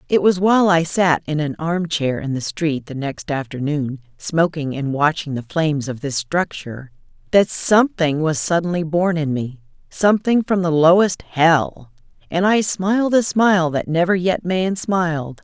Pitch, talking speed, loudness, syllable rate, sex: 165 Hz, 175 wpm, -18 LUFS, 4.6 syllables/s, female